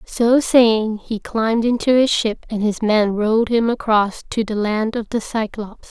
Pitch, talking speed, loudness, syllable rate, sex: 220 Hz, 195 wpm, -18 LUFS, 4.4 syllables/s, female